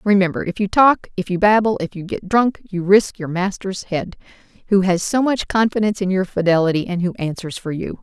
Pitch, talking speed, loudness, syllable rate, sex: 195 Hz, 215 wpm, -18 LUFS, 5.5 syllables/s, female